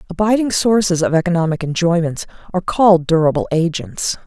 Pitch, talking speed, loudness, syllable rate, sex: 175 Hz, 125 wpm, -16 LUFS, 6.0 syllables/s, female